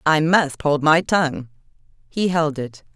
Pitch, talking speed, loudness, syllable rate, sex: 155 Hz, 165 wpm, -19 LUFS, 4.4 syllables/s, female